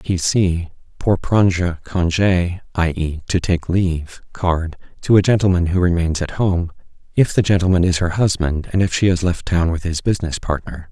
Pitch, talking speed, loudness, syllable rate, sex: 90 Hz, 185 wpm, -18 LUFS, 4.5 syllables/s, male